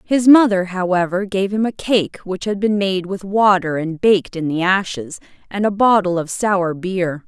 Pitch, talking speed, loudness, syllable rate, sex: 190 Hz, 200 wpm, -17 LUFS, 4.5 syllables/s, female